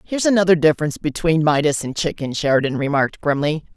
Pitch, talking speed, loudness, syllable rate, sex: 155 Hz, 160 wpm, -18 LUFS, 6.7 syllables/s, female